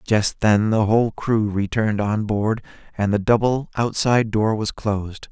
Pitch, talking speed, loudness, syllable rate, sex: 110 Hz, 170 wpm, -20 LUFS, 4.6 syllables/s, male